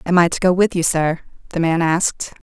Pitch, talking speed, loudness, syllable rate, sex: 170 Hz, 240 wpm, -18 LUFS, 5.8 syllables/s, female